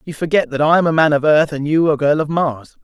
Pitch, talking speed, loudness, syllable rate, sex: 155 Hz, 315 wpm, -15 LUFS, 5.9 syllables/s, male